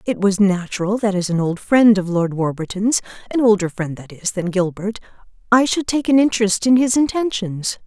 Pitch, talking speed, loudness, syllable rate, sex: 205 Hz, 185 wpm, -18 LUFS, 5.2 syllables/s, female